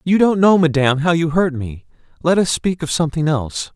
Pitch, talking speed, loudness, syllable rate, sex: 160 Hz, 225 wpm, -17 LUFS, 5.8 syllables/s, male